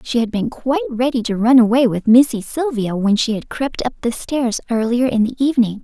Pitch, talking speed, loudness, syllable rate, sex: 240 Hz, 225 wpm, -17 LUFS, 5.6 syllables/s, female